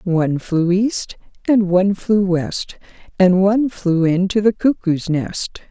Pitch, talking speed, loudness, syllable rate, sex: 190 Hz, 145 wpm, -17 LUFS, 3.9 syllables/s, female